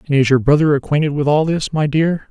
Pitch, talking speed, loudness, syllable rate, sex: 145 Hz, 260 wpm, -15 LUFS, 6.1 syllables/s, male